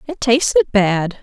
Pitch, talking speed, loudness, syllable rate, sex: 245 Hz, 145 wpm, -15 LUFS, 3.7 syllables/s, female